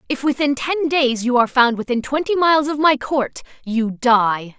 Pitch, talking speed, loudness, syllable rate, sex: 265 Hz, 195 wpm, -18 LUFS, 4.8 syllables/s, female